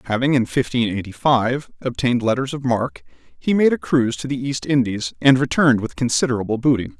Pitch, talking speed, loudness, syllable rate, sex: 125 Hz, 190 wpm, -19 LUFS, 5.9 syllables/s, male